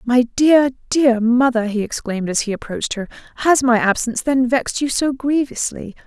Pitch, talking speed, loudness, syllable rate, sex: 245 Hz, 180 wpm, -18 LUFS, 5.3 syllables/s, female